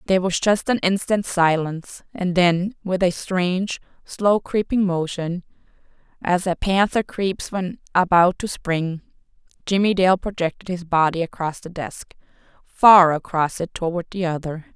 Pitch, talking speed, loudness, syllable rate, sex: 180 Hz, 140 wpm, -20 LUFS, 4.4 syllables/s, female